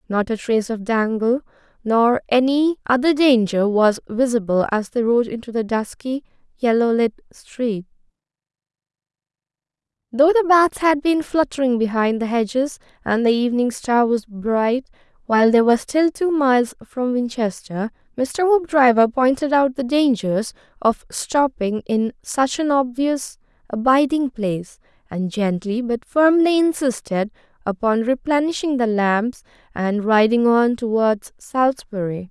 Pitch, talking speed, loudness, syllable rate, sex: 245 Hz, 130 wpm, -19 LUFS, 4.4 syllables/s, female